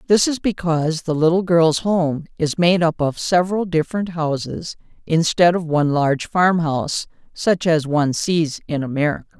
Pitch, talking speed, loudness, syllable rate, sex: 165 Hz, 160 wpm, -19 LUFS, 5.0 syllables/s, female